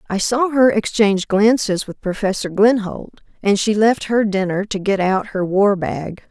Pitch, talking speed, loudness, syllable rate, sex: 205 Hz, 180 wpm, -17 LUFS, 4.6 syllables/s, female